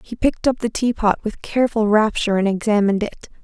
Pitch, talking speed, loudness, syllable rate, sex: 215 Hz, 190 wpm, -19 LUFS, 6.6 syllables/s, female